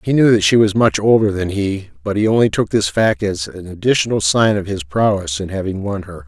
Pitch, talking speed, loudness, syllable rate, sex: 105 Hz, 250 wpm, -16 LUFS, 5.5 syllables/s, male